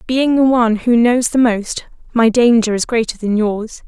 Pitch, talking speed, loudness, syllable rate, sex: 230 Hz, 200 wpm, -14 LUFS, 4.6 syllables/s, female